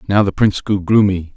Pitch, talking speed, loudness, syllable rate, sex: 100 Hz, 220 wpm, -15 LUFS, 5.9 syllables/s, male